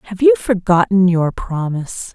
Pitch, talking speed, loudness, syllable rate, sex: 195 Hz, 140 wpm, -16 LUFS, 4.7 syllables/s, female